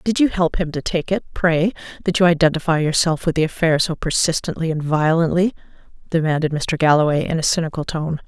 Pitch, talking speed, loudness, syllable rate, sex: 165 Hz, 190 wpm, -19 LUFS, 5.9 syllables/s, female